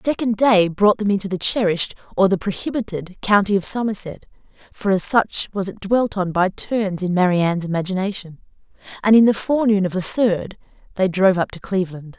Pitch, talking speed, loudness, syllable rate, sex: 195 Hz, 185 wpm, -19 LUFS, 5.7 syllables/s, female